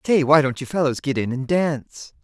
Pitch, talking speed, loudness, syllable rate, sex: 145 Hz, 240 wpm, -20 LUFS, 5.4 syllables/s, female